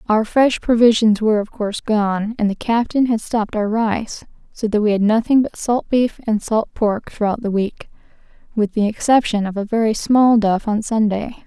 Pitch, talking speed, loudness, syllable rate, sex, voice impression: 220 Hz, 200 wpm, -18 LUFS, 4.9 syllables/s, female, feminine, adult-like, slightly relaxed, slightly weak, soft, slightly muffled, slightly cute, calm, friendly, reassuring, kind